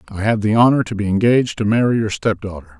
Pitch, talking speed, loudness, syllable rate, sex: 110 Hz, 235 wpm, -17 LUFS, 6.5 syllables/s, male